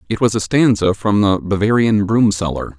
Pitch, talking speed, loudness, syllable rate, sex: 105 Hz, 195 wpm, -15 LUFS, 5.1 syllables/s, male